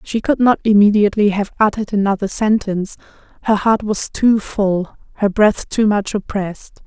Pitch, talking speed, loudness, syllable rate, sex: 205 Hz, 155 wpm, -16 LUFS, 5.3 syllables/s, female